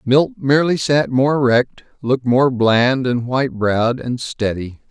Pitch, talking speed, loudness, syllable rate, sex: 130 Hz, 160 wpm, -17 LUFS, 4.4 syllables/s, male